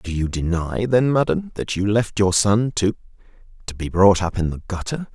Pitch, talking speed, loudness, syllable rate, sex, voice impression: 100 Hz, 200 wpm, -20 LUFS, 4.9 syllables/s, male, very masculine, middle-aged, slightly tensed, slightly weak, bright, soft, muffled, fluent, slightly raspy, cool, intellectual, slightly refreshing, sincere, calm, slightly mature, very friendly, very reassuring, very unique, slightly elegant, wild, sweet, lively, kind, slightly intense